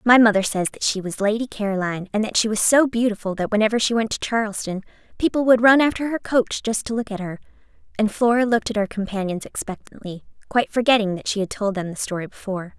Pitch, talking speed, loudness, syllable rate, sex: 215 Hz, 225 wpm, -21 LUFS, 6.5 syllables/s, female